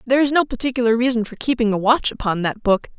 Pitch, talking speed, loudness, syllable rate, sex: 235 Hz, 240 wpm, -19 LUFS, 6.8 syllables/s, female